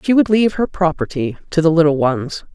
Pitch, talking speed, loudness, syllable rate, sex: 165 Hz, 210 wpm, -16 LUFS, 5.7 syllables/s, female